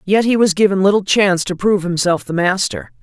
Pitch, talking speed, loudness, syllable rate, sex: 185 Hz, 220 wpm, -15 LUFS, 6.0 syllables/s, female